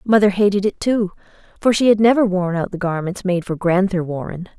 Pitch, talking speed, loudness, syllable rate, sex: 190 Hz, 210 wpm, -18 LUFS, 5.6 syllables/s, female